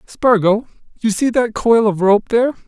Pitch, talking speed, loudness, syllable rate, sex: 220 Hz, 180 wpm, -15 LUFS, 4.8 syllables/s, male